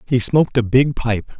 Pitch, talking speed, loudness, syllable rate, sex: 125 Hz, 215 wpm, -17 LUFS, 4.9 syllables/s, male